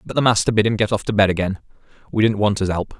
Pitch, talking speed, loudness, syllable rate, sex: 105 Hz, 300 wpm, -19 LUFS, 7.2 syllables/s, male